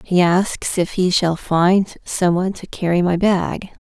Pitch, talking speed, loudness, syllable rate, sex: 180 Hz, 190 wpm, -18 LUFS, 3.9 syllables/s, female